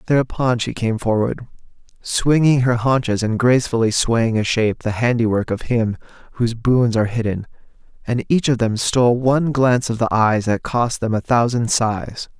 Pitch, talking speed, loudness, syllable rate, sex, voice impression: 120 Hz, 175 wpm, -18 LUFS, 5.1 syllables/s, male, very masculine, adult-like, thick, slightly relaxed, weak, dark, slightly soft, clear, slightly fluent, cool, intellectual, slightly refreshing, very sincere, very calm, mature, friendly, reassuring, unique, slightly elegant, slightly wild, sweet, slightly lively, kind, slightly modest